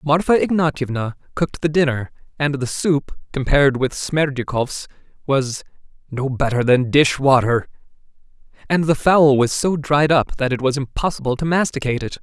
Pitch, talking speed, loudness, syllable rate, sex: 140 Hz, 150 wpm, -18 LUFS, 5.1 syllables/s, male